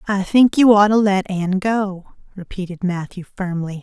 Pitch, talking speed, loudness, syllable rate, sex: 195 Hz, 170 wpm, -17 LUFS, 4.9 syllables/s, female